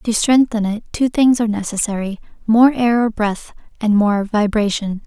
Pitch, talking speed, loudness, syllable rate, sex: 220 Hz, 165 wpm, -17 LUFS, 4.8 syllables/s, female